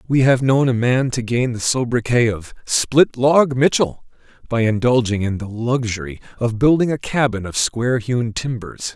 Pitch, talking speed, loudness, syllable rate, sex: 120 Hz, 175 wpm, -18 LUFS, 4.6 syllables/s, male